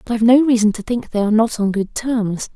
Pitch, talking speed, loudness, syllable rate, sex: 225 Hz, 280 wpm, -17 LUFS, 6.2 syllables/s, female